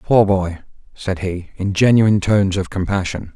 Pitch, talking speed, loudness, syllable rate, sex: 95 Hz, 160 wpm, -18 LUFS, 4.9 syllables/s, male